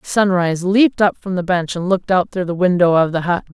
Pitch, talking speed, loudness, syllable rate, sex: 180 Hz, 255 wpm, -16 LUFS, 6.0 syllables/s, female